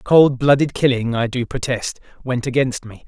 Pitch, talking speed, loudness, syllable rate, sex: 125 Hz, 195 wpm, -18 LUFS, 5.0 syllables/s, male